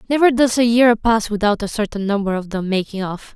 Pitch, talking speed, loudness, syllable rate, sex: 215 Hz, 230 wpm, -18 LUFS, 5.7 syllables/s, female